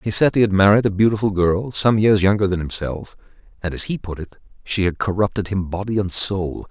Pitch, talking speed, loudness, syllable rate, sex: 100 Hz, 225 wpm, -19 LUFS, 5.6 syllables/s, male